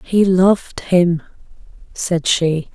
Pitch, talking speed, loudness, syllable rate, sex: 175 Hz, 110 wpm, -16 LUFS, 3.1 syllables/s, female